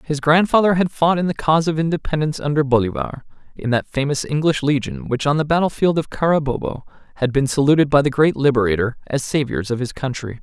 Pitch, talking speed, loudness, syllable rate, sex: 145 Hz, 195 wpm, -19 LUFS, 6.2 syllables/s, male